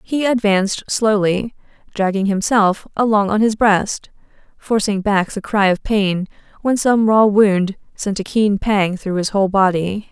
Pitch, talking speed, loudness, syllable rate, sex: 205 Hz, 160 wpm, -17 LUFS, 4.2 syllables/s, female